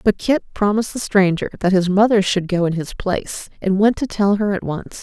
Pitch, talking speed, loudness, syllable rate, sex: 200 Hz, 240 wpm, -18 LUFS, 5.5 syllables/s, female